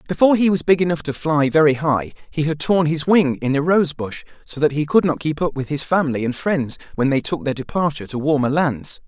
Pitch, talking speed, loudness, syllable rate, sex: 150 Hz, 245 wpm, -19 LUFS, 5.9 syllables/s, male